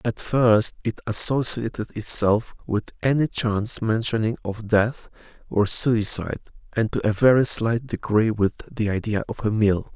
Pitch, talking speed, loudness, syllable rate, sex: 110 Hz, 150 wpm, -22 LUFS, 4.5 syllables/s, male